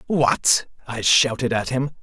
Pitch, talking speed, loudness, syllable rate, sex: 125 Hz, 150 wpm, -19 LUFS, 3.7 syllables/s, male